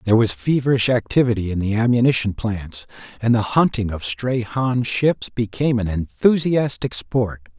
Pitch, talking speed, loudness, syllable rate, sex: 115 Hz, 150 wpm, -20 LUFS, 4.9 syllables/s, male